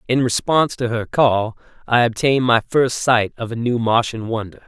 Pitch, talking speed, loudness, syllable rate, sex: 120 Hz, 190 wpm, -18 LUFS, 5.1 syllables/s, male